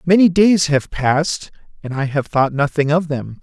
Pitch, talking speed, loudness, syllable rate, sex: 150 Hz, 195 wpm, -17 LUFS, 4.6 syllables/s, male